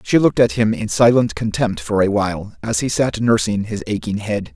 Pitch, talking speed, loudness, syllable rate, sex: 110 Hz, 225 wpm, -18 LUFS, 5.3 syllables/s, male